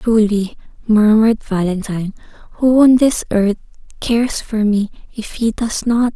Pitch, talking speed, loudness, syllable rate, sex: 220 Hz, 135 wpm, -15 LUFS, 4.6 syllables/s, female